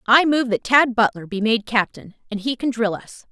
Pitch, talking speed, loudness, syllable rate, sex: 230 Hz, 235 wpm, -19 LUFS, 5.0 syllables/s, female